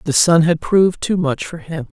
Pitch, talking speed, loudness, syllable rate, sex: 165 Hz, 240 wpm, -16 LUFS, 5.1 syllables/s, female